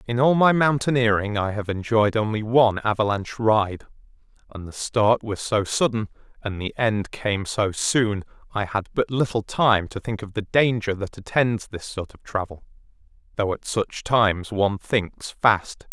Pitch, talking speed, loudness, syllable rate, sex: 110 Hz, 175 wpm, -23 LUFS, 4.5 syllables/s, male